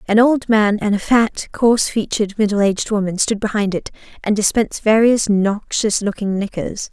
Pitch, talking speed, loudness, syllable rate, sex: 210 Hz, 175 wpm, -17 LUFS, 5.2 syllables/s, female